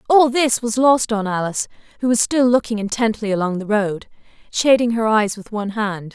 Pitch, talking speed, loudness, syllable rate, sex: 220 Hz, 195 wpm, -18 LUFS, 5.4 syllables/s, female